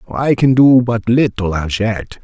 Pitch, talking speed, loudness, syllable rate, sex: 110 Hz, 190 wpm, -14 LUFS, 4.0 syllables/s, male